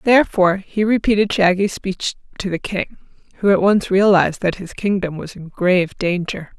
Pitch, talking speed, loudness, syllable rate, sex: 190 Hz, 175 wpm, -18 LUFS, 5.2 syllables/s, female